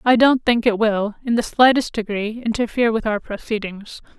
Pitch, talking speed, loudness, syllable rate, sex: 225 Hz, 185 wpm, -19 LUFS, 5.3 syllables/s, female